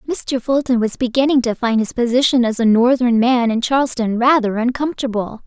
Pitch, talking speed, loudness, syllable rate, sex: 245 Hz, 175 wpm, -16 LUFS, 5.5 syllables/s, female